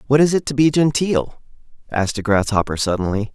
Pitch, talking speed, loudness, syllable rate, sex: 120 Hz, 180 wpm, -18 LUFS, 5.9 syllables/s, male